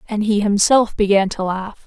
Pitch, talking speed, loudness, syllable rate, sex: 205 Hz, 195 wpm, -17 LUFS, 4.7 syllables/s, female